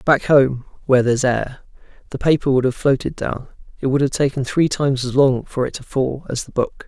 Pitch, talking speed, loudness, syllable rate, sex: 135 Hz, 225 wpm, -19 LUFS, 5.6 syllables/s, male